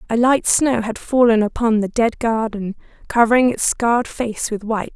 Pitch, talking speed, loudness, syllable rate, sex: 230 Hz, 180 wpm, -18 LUFS, 4.9 syllables/s, female